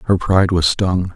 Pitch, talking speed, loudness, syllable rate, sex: 90 Hz, 210 wpm, -16 LUFS, 5.2 syllables/s, male